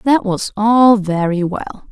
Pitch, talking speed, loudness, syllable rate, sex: 210 Hz, 155 wpm, -14 LUFS, 3.3 syllables/s, female